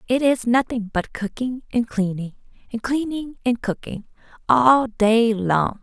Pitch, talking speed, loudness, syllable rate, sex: 230 Hz, 145 wpm, -21 LUFS, 4.0 syllables/s, female